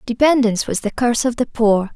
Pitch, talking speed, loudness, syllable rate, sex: 235 Hz, 215 wpm, -17 LUFS, 6.1 syllables/s, female